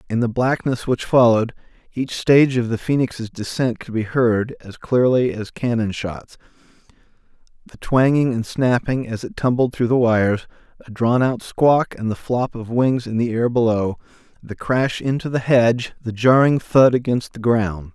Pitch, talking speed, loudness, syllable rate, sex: 120 Hz, 175 wpm, -19 LUFS, 4.6 syllables/s, male